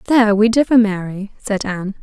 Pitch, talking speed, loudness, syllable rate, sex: 210 Hz, 180 wpm, -16 LUFS, 5.8 syllables/s, female